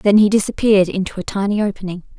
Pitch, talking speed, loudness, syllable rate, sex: 200 Hz, 195 wpm, -17 LUFS, 6.9 syllables/s, female